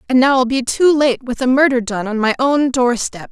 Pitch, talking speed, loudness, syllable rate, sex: 255 Hz, 255 wpm, -15 LUFS, 5.2 syllables/s, female